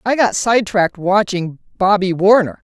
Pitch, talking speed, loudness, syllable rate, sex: 195 Hz, 135 wpm, -15 LUFS, 5.0 syllables/s, female